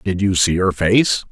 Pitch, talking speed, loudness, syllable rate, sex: 95 Hz, 230 wpm, -16 LUFS, 4.3 syllables/s, male